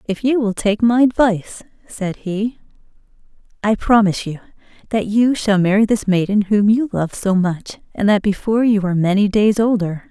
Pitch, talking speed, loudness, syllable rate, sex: 205 Hz, 180 wpm, -17 LUFS, 5.1 syllables/s, female